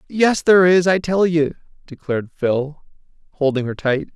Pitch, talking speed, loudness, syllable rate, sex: 160 Hz, 160 wpm, -18 LUFS, 4.8 syllables/s, male